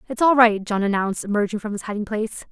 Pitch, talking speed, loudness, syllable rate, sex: 215 Hz, 240 wpm, -21 LUFS, 7.0 syllables/s, female